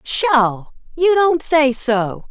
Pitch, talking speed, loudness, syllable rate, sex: 275 Hz, 130 wpm, -16 LUFS, 2.6 syllables/s, female